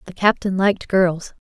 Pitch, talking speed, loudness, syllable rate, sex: 190 Hz, 165 wpm, -19 LUFS, 5.0 syllables/s, female